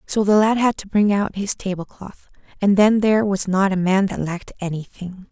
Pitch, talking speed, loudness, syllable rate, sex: 195 Hz, 215 wpm, -19 LUFS, 5.2 syllables/s, female